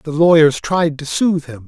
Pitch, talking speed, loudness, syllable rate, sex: 155 Hz, 215 wpm, -15 LUFS, 4.9 syllables/s, male